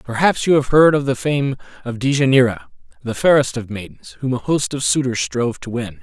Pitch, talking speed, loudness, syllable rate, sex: 130 Hz, 210 wpm, -17 LUFS, 5.5 syllables/s, male